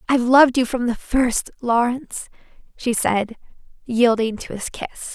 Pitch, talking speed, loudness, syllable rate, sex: 240 Hz, 150 wpm, -20 LUFS, 4.6 syllables/s, female